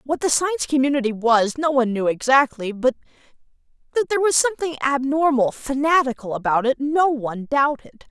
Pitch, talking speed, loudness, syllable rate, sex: 270 Hz, 155 wpm, -20 LUFS, 5.7 syllables/s, female